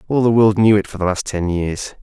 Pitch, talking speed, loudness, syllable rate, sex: 100 Hz, 295 wpm, -16 LUFS, 5.6 syllables/s, male